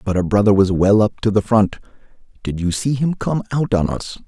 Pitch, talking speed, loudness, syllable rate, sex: 105 Hz, 240 wpm, -17 LUFS, 5.3 syllables/s, male